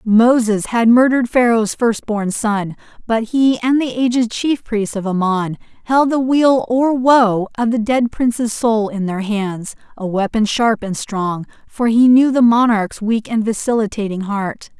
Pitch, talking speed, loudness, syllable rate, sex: 225 Hz, 170 wpm, -16 LUFS, 4.1 syllables/s, female